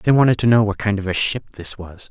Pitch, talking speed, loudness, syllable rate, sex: 105 Hz, 315 wpm, -18 LUFS, 6.2 syllables/s, male